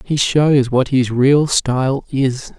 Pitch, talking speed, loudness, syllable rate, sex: 135 Hz, 165 wpm, -15 LUFS, 3.3 syllables/s, male